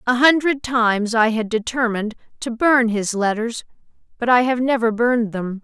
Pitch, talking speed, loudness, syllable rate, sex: 235 Hz, 170 wpm, -19 LUFS, 5.1 syllables/s, female